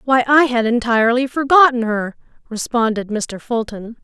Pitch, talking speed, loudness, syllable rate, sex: 240 Hz, 135 wpm, -16 LUFS, 4.8 syllables/s, female